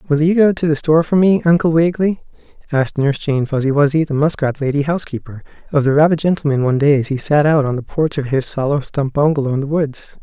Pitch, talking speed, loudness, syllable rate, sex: 150 Hz, 235 wpm, -16 LUFS, 6.5 syllables/s, male